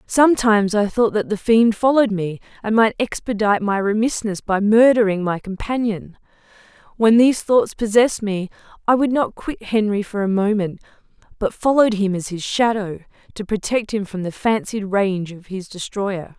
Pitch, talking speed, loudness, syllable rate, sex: 210 Hz, 170 wpm, -19 LUFS, 5.1 syllables/s, female